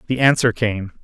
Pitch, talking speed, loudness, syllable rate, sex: 115 Hz, 175 wpm, -18 LUFS, 5.1 syllables/s, male